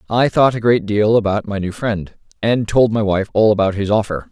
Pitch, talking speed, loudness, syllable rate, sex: 105 Hz, 235 wpm, -16 LUFS, 5.2 syllables/s, male